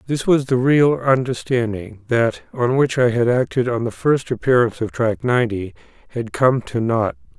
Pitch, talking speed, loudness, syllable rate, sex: 125 Hz, 180 wpm, -19 LUFS, 4.8 syllables/s, male